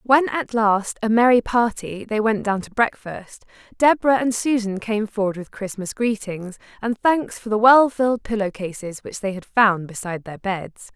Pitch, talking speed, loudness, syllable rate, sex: 215 Hz, 185 wpm, -20 LUFS, 4.8 syllables/s, female